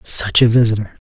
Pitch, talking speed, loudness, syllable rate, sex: 110 Hz, 170 wpm, -14 LUFS, 5.5 syllables/s, male